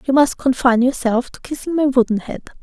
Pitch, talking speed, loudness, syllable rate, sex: 255 Hz, 205 wpm, -17 LUFS, 6.0 syllables/s, female